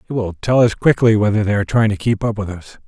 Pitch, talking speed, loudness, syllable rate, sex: 105 Hz, 290 wpm, -16 LUFS, 6.5 syllables/s, male